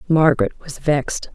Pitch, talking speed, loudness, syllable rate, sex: 145 Hz, 135 wpm, -19 LUFS, 5.7 syllables/s, female